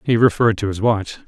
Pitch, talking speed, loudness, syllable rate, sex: 105 Hz, 235 wpm, -18 LUFS, 6.5 syllables/s, male